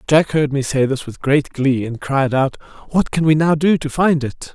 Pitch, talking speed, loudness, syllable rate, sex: 145 Hz, 250 wpm, -17 LUFS, 4.7 syllables/s, male